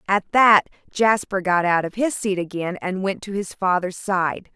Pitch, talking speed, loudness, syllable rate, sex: 190 Hz, 195 wpm, -21 LUFS, 4.5 syllables/s, female